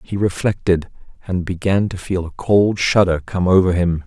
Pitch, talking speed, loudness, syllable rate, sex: 90 Hz, 175 wpm, -18 LUFS, 4.8 syllables/s, male